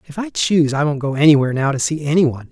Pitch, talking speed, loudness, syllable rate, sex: 150 Hz, 285 wpm, -16 LUFS, 7.5 syllables/s, male